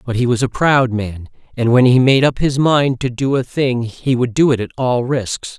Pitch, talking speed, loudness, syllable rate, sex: 125 Hz, 260 wpm, -15 LUFS, 4.7 syllables/s, male